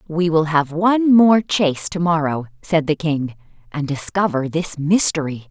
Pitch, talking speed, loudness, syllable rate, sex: 160 Hz, 165 wpm, -18 LUFS, 4.5 syllables/s, female